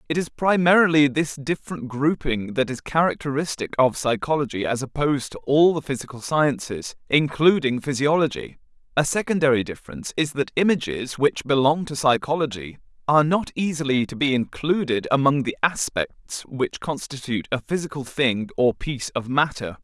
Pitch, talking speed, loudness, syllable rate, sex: 140 Hz, 145 wpm, -22 LUFS, 5.3 syllables/s, male